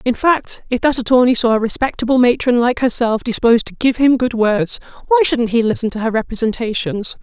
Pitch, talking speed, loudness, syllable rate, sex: 240 Hz, 200 wpm, -16 LUFS, 5.7 syllables/s, female